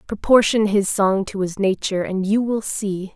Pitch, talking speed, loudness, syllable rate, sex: 200 Hz, 190 wpm, -19 LUFS, 4.7 syllables/s, female